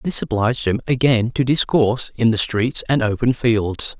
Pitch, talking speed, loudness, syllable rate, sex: 120 Hz, 180 wpm, -18 LUFS, 4.8 syllables/s, male